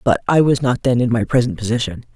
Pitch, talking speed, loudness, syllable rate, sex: 120 Hz, 250 wpm, -17 LUFS, 6.2 syllables/s, female